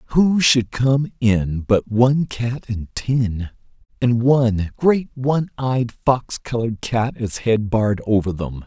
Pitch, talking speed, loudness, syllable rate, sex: 120 Hz, 150 wpm, -19 LUFS, 3.7 syllables/s, male